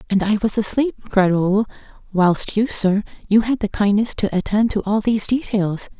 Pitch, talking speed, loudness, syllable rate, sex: 205 Hz, 190 wpm, -19 LUFS, 4.9 syllables/s, female